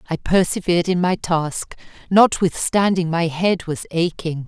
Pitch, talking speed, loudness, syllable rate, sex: 175 Hz, 135 wpm, -19 LUFS, 4.4 syllables/s, female